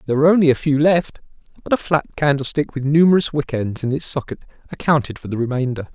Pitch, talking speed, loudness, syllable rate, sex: 140 Hz, 210 wpm, -18 LUFS, 6.6 syllables/s, male